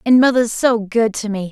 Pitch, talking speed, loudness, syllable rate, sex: 225 Hz, 235 wpm, -16 LUFS, 5.0 syllables/s, female